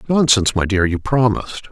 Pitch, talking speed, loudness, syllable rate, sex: 110 Hz, 175 wpm, -16 LUFS, 5.9 syllables/s, male